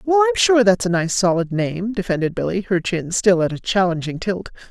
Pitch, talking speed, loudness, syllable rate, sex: 195 Hz, 215 wpm, -19 LUFS, 5.5 syllables/s, female